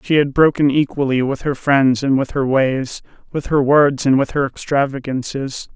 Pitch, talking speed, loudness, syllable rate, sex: 135 Hz, 190 wpm, -17 LUFS, 4.7 syllables/s, male